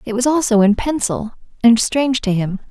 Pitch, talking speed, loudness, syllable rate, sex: 230 Hz, 200 wpm, -16 LUFS, 5.4 syllables/s, female